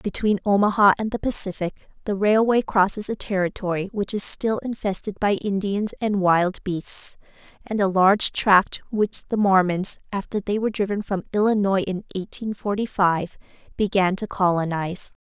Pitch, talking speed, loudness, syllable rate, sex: 195 Hz, 155 wpm, -22 LUFS, 4.9 syllables/s, female